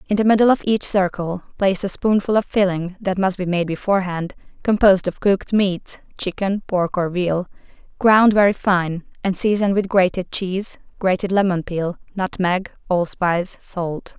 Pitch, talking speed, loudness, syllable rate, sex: 190 Hz, 160 wpm, -19 LUFS, 4.8 syllables/s, female